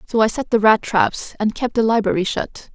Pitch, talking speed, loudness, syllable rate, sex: 220 Hz, 240 wpm, -18 LUFS, 5.2 syllables/s, female